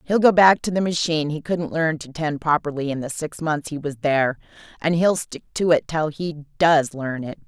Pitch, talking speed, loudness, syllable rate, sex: 155 Hz, 235 wpm, -21 LUFS, 5.3 syllables/s, female